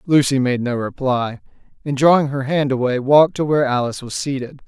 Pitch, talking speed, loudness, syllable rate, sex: 135 Hz, 190 wpm, -18 LUFS, 5.9 syllables/s, male